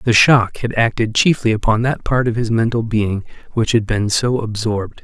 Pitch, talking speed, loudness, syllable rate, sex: 115 Hz, 205 wpm, -17 LUFS, 4.9 syllables/s, male